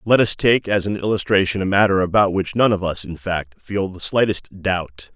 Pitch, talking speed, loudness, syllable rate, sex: 95 Hz, 220 wpm, -19 LUFS, 5.0 syllables/s, male